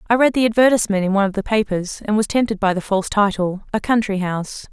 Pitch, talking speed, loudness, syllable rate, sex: 205 Hz, 240 wpm, -18 LUFS, 6.8 syllables/s, female